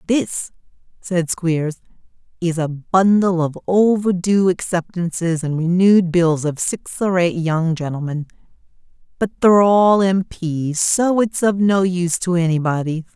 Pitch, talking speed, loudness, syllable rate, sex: 175 Hz, 135 wpm, -18 LUFS, 4.2 syllables/s, female